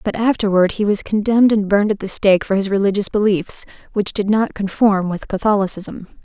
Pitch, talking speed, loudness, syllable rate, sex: 205 Hz, 190 wpm, -17 LUFS, 5.8 syllables/s, female